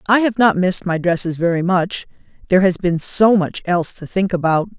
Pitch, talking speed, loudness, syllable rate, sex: 185 Hz, 200 wpm, -17 LUFS, 5.7 syllables/s, female